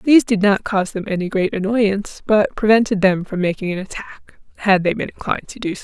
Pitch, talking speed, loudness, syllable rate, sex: 200 Hz, 225 wpm, -18 LUFS, 5.9 syllables/s, female